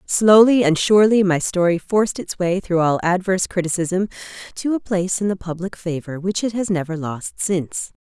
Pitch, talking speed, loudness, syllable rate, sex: 185 Hz, 185 wpm, -19 LUFS, 5.3 syllables/s, female